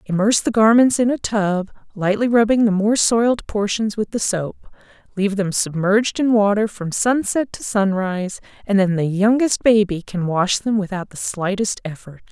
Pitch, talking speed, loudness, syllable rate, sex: 205 Hz, 175 wpm, -18 LUFS, 5.0 syllables/s, female